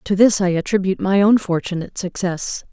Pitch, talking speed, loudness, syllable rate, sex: 190 Hz, 175 wpm, -18 LUFS, 6.2 syllables/s, female